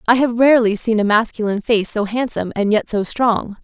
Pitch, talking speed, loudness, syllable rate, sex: 225 Hz, 215 wpm, -17 LUFS, 5.9 syllables/s, female